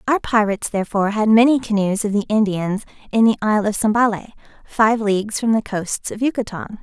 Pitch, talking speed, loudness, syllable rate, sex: 215 Hz, 185 wpm, -18 LUFS, 5.8 syllables/s, female